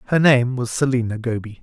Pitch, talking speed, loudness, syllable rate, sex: 125 Hz, 185 wpm, -19 LUFS, 5.8 syllables/s, male